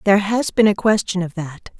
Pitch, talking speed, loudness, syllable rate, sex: 195 Hz, 235 wpm, -18 LUFS, 5.4 syllables/s, female